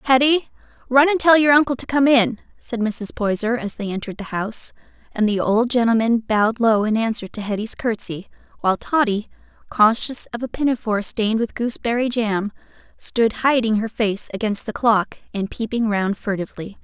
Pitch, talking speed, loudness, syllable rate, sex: 230 Hz, 175 wpm, -20 LUFS, 5.4 syllables/s, female